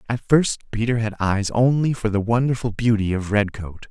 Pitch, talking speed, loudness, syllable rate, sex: 110 Hz, 185 wpm, -21 LUFS, 5.1 syllables/s, male